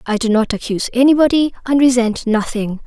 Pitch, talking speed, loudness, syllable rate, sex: 240 Hz, 170 wpm, -15 LUFS, 5.8 syllables/s, female